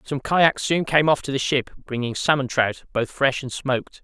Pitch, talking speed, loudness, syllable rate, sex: 135 Hz, 225 wpm, -22 LUFS, 4.7 syllables/s, male